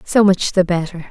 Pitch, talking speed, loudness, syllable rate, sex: 180 Hz, 215 wpm, -16 LUFS, 5.1 syllables/s, female